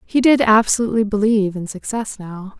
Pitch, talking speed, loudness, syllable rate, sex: 215 Hz, 160 wpm, -17 LUFS, 5.7 syllables/s, female